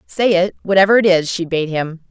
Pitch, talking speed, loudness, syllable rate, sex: 180 Hz, 230 wpm, -15 LUFS, 5.3 syllables/s, female